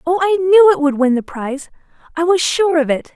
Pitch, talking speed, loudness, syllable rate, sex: 320 Hz, 230 wpm, -15 LUFS, 5.7 syllables/s, female